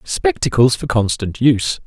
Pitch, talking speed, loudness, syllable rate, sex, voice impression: 135 Hz, 130 wpm, -16 LUFS, 4.6 syllables/s, male, very masculine, very middle-aged, very thick, slightly tensed, very powerful, bright, soft, clear, very fluent, slightly raspy, cool, intellectual, very refreshing, sincere, calm, slightly mature, friendly, very reassuring, very unique, slightly elegant, wild, sweet, very lively, kind, intense, light